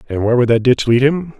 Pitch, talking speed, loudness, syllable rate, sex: 130 Hz, 300 wpm, -14 LUFS, 6.7 syllables/s, male